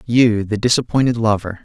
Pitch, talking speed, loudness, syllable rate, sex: 115 Hz, 145 wpm, -16 LUFS, 5.2 syllables/s, male